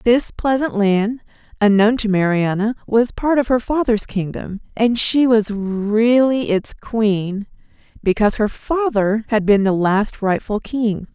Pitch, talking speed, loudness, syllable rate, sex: 220 Hz, 145 wpm, -18 LUFS, 3.9 syllables/s, female